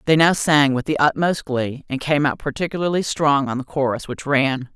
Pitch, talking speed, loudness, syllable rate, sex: 145 Hz, 215 wpm, -20 LUFS, 5.1 syllables/s, female